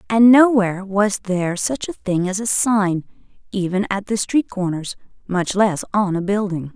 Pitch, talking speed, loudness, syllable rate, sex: 200 Hz, 180 wpm, -19 LUFS, 4.5 syllables/s, female